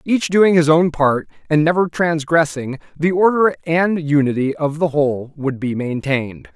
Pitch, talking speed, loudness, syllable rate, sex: 155 Hz, 165 wpm, -17 LUFS, 4.6 syllables/s, male